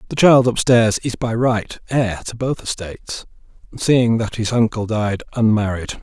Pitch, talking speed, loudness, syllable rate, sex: 115 Hz, 160 wpm, -18 LUFS, 4.4 syllables/s, male